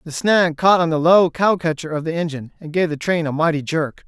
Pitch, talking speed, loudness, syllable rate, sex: 165 Hz, 265 wpm, -18 LUFS, 5.7 syllables/s, male